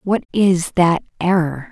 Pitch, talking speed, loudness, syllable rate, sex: 180 Hz, 140 wpm, -17 LUFS, 3.7 syllables/s, female